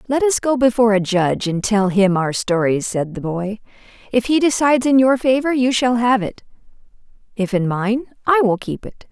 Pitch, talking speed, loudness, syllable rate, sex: 225 Hz, 205 wpm, -17 LUFS, 5.2 syllables/s, female